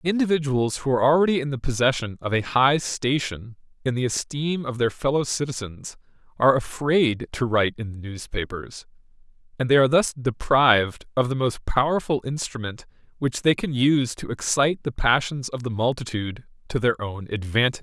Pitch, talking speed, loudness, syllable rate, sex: 130 Hz, 170 wpm, -23 LUFS, 5.5 syllables/s, male